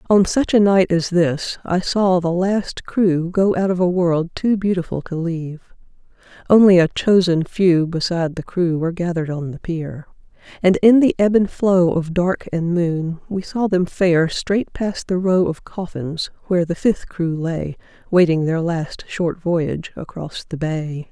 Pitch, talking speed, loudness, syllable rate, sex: 175 Hz, 185 wpm, -18 LUFS, 4.3 syllables/s, female